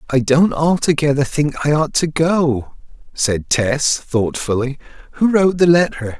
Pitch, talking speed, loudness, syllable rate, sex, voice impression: 145 Hz, 145 wpm, -16 LUFS, 4.3 syllables/s, male, masculine, very adult-like, slightly tensed, slightly powerful, refreshing, slightly kind